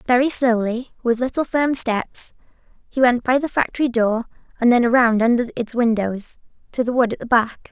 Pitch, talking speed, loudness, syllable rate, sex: 240 Hz, 185 wpm, -19 LUFS, 5.2 syllables/s, female